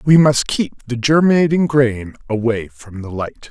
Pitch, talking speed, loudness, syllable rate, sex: 130 Hz, 170 wpm, -16 LUFS, 4.5 syllables/s, male